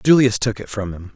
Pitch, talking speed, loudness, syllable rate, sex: 110 Hz, 260 wpm, -19 LUFS, 5.7 syllables/s, male